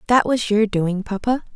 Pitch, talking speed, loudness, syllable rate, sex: 215 Hz, 195 wpm, -20 LUFS, 4.8 syllables/s, female